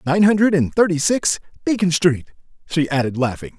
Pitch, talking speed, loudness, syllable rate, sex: 165 Hz, 170 wpm, -18 LUFS, 5.4 syllables/s, male